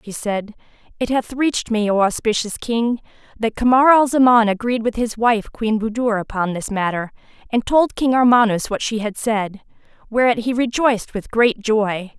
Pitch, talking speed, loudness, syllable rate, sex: 225 Hz, 175 wpm, -18 LUFS, 4.8 syllables/s, female